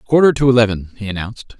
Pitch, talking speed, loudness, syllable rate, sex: 115 Hz, 190 wpm, -16 LUFS, 7.1 syllables/s, male